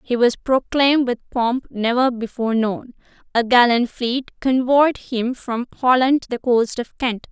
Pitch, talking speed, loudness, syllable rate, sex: 245 Hz, 165 wpm, -19 LUFS, 4.4 syllables/s, female